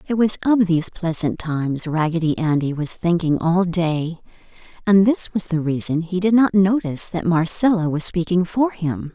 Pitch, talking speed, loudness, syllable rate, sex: 175 Hz, 175 wpm, -19 LUFS, 4.8 syllables/s, female